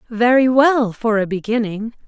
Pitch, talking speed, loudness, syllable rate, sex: 230 Hz, 145 wpm, -16 LUFS, 4.4 syllables/s, female